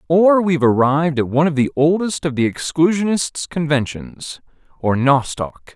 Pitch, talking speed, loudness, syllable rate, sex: 150 Hz, 135 wpm, -17 LUFS, 5.1 syllables/s, male